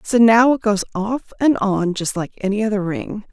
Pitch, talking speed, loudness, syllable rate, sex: 210 Hz, 215 wpm, -18 LUFS, 4.8 syllables/s, female